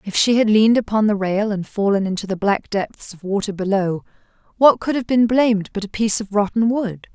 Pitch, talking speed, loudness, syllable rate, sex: 210 Hz, 225 wpm, -19 LUFS, 5.6 syllables/s, female